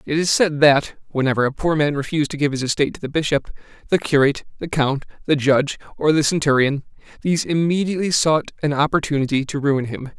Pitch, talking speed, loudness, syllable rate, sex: 145 Hz, 195 wpm, -19 LUFS, 6.4 syllables/s, male